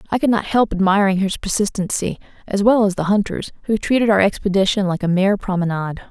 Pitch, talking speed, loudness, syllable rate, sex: 200 Hz, 195 wpm, -18 LUFS, 6.3 syllables/s, female